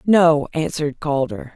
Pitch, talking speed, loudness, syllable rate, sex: 155 Hz, 115 wpm, -19 LUFS, 4.4 syllables/s, female